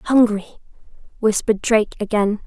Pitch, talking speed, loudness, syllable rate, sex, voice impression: 215 Hz, 100 wpm, -19 LUFS, 5.7 syllables/s, female, slightly gender-neutral, young, slightly tensed, slightly cute, friendly, slightly lively